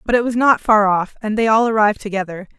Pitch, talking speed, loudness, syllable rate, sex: 215 Hz, 255 wpm, -16 LUFS, 6.4 syllables/s, female